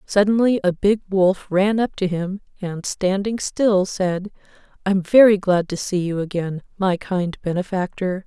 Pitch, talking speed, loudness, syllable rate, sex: 190 Hz, 160 wpm, -20 LUFS, 4.2 syllables/s, female